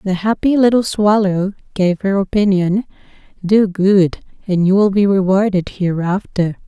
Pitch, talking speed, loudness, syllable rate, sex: 195 Hz, 125 wpm, -15 LUFS, 4.4 syllables/s, female